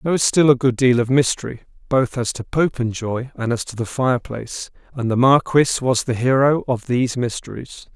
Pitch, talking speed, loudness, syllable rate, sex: 125 Hz, 195 wpm, -19 LUFS, 5.6 syllables/s, male